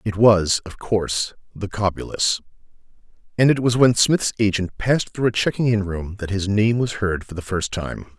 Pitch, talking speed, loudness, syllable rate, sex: 105 Hz, 200 wpm, -20 LUFS, 4.9 syllables/s, male